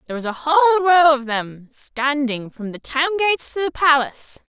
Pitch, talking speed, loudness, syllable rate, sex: 285 Hz, 200 wpm, -18 LUFS, 5.4 syllables/s, female